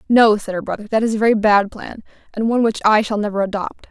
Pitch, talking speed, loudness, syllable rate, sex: 215 Hz, 260 wpm, -17 LUFS, 6.5 syllables/s, female